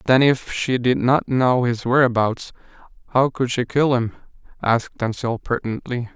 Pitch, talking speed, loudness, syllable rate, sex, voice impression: 125 Hz, 155 wpm, -20 LUFS, 4.7 syllables/s, male, very masculine, adult-like, slightly middle-aged, very thick, slightly relaxed, weak, slightly dark, hard, slightly muffled, fluent, cool, intellectual, sincere, calm, slightly mature, slightly friendly, reassuring, elegant, sweet, kind, modest